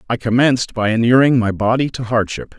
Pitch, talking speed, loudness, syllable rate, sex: 120 Hz, 185 wpm, -16 LUFS, 5.8 syllables/s, male